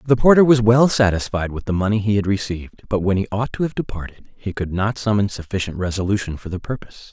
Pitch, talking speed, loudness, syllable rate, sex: 105 Hz, 230 wpm, -19 LUFS, 6.4 syllables/s, male